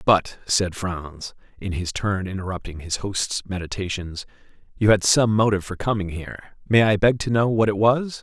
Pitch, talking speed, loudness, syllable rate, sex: 100 Hz, 180 wpm, -22 LUFS, 4.9 syllables/s, male